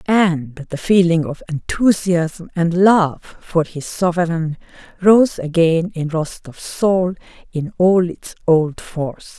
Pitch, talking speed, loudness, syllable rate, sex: 170 Hz, 130 wpm, -17 LUFS, 3.4 syllables/s, female